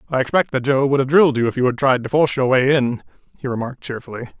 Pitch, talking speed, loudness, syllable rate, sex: 130 Hz, 275 wpm, -18 LUFS, 7.4 syllables/s, male